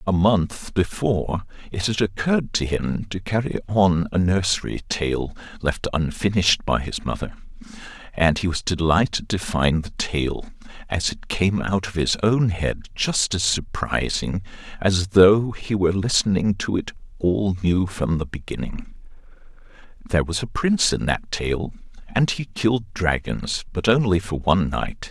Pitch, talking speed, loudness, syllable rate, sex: 95 Hz, 160 wpm, -22 LUFS, 4.4 syllables/s, male